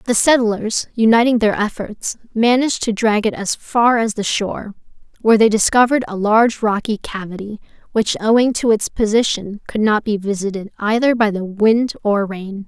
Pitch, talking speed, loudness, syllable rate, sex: 215 Hz, 170 wpm, -17 LUFS, 5.0 syllables/s, female